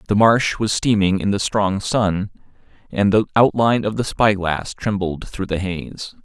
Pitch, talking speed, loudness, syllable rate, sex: 100 Hz, 185 wpm, -19 LUFS, 4.3 syllables/s, male